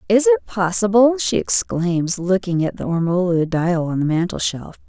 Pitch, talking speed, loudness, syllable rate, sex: 190 Hz, 160 wpm, -18 LUFS, 4.5 syllables/s, female